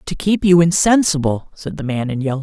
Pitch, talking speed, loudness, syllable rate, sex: 160 Hz, 225 wpm, -16 LUFS, 5.7 syllables/s, male